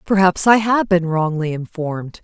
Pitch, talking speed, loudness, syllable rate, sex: 175 Hz, 160 wpm, -17 LUFS, 4.7 syllables/s, female